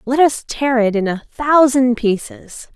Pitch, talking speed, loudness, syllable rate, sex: 250 Hz, 175 wpm, -16 LUFS, 4.0 syllables/s, female